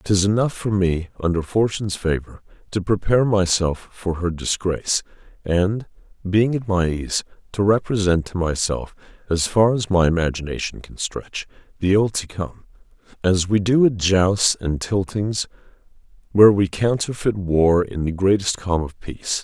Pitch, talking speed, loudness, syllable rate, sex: 95 Hz, 155 wpm, -20 LUFS, 4.6 syllables/s, male